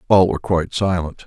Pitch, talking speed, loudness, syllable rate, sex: 90 Hz, 190 wpm, -19 LUFS, 6.4 syllables/s, male